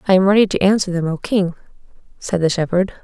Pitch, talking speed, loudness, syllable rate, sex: 185 Hz, 215 wpm, -17 LUFS, 6.3 syllables/s, female